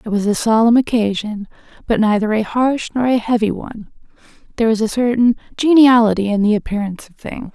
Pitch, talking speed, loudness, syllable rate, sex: 225 Hz, 185 wpm, -16 LUFS, 6.0 syllables/s, female